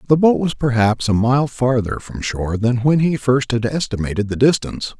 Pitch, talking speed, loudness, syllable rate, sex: 125 Hz, 205 wpm, -18 LUFS, 5.2 syllables/s, male